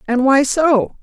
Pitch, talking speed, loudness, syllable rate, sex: 270 Hz, 175 wpm, -14 LUFS, 3.5 syllables/s, female